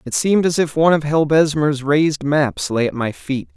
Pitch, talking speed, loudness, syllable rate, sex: 145 Hz, 220 wpm, -17 LUFS, 6.0 syllables/s, male